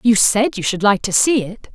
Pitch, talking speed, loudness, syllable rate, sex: 210 Hz, 275 wpm, -16 LUFS, 5.0 syllables/s, female